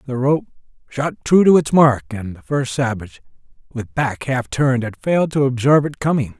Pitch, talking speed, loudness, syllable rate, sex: 135 Hz, 195 wpm, -18 LUFS, 5.4 syllables/s, male